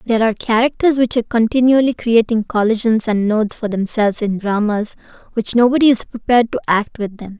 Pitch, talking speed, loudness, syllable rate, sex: 225 Hz, 180 wpm, -16 LUFS, 6.0 syllables/s, female